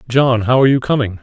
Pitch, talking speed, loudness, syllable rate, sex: 120 Hz, 245 wpm, -14 LUFS, 6.7 syllables/s, male